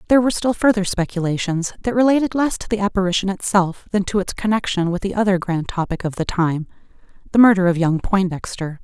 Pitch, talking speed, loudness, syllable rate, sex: 195 Hz, 190 wpm, -19 LUFS, 6.2 syllables/s, female